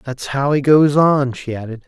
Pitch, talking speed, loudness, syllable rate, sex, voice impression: 135 Hz, 225 wpm, -16 LUFS, 4.7 syllables/s, male, masculine, adult-like, slightly muffled, friendly, slightly unique